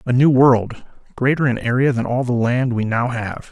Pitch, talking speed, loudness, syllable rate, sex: 125 Hz, 220 wpm, -18 LUFS, 4.8 syllables/s, male